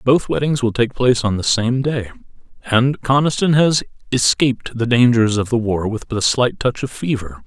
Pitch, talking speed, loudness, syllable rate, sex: 120 Hz, 195 wpm, -17 LUFS, 4.9 syllables/s, male